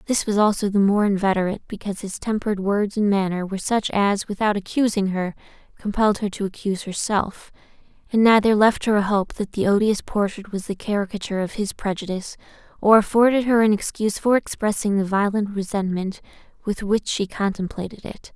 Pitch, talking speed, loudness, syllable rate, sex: 205 Hz, 175 wpm, -21 LUFS, 5.9 syllables/s, female